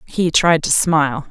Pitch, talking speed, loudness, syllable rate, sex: 155 Hz, 185 wpm, -15 LUFS, 4.3 syllables/s, female